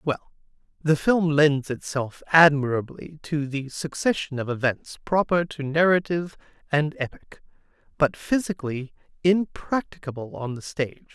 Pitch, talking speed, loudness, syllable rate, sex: 150 Hz, 120 wpm, -24 LUFS, 4.6 syllables/s, male